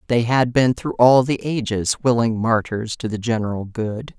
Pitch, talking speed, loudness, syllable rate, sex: 115 Hz, 185 wpm, -19 LUFS, 4.6 syllables/s, female